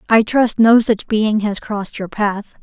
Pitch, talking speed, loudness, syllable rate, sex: 215 Hz, 205 wpm, -16 LUFS, 4.2 syllables/s, female